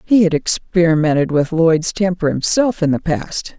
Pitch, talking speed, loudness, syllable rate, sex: 165 Hz, 165 wpm, -16 LUFS, 4.6 syllables/s, female